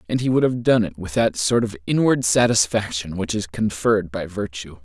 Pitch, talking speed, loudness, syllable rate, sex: 95 Hz, 210 wpm, -20 LUFS, 5.2 syllables/s, male